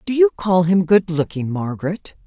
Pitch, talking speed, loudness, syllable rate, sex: 175 Hz, 185 wpm, -18 LUFS, 4.9 syllables/s, female